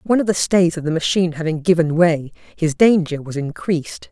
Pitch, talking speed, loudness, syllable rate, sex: 170 Hz, 205 wpm, -18 LUFS, 5.6 syllables/s, female